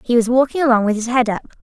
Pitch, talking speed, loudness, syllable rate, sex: 240 Hz, 295 wpm, -16 LUFS, 7.2 syllables/s, female